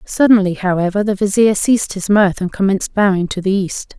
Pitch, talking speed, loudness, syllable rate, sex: 195 Hz, 195 wpm, -15 LUFS, 5.7 syllables/s, female